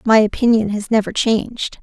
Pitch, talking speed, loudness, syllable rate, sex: 220 Hz, 165 wpm, -17 LUFS, 5.4 syllables/s, female